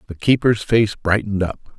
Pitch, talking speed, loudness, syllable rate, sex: 105 Hz, 170 wpm, -18 LUFS, 5.0 syllables/s, male